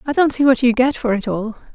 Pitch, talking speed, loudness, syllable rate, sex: 250 Hz, 310 wpm, -17 LUFS, 6.0 syllables/s, female